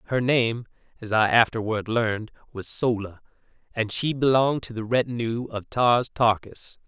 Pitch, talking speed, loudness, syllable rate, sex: 115 Hz, 150 wpm, -24 LUFS, 4.7 syllables/s, male